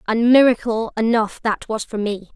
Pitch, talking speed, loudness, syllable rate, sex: 225 Hz, 180 wpm, -18 LUFS, 4.8 syllables/s, female